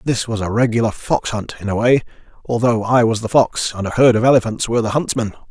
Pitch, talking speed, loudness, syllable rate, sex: 115 Hz, 240 wpm, -17 LUFS, 6.1 syllables/s, male